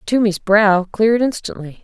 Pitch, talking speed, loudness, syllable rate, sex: 205 Hz, 130 wpm, -15 LUFS, 4.7 syllables/s, female